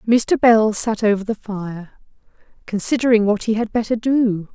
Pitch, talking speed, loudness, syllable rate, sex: 220 Hz, 160 wpm, -18 LUFS, 4.6 syllables/s, female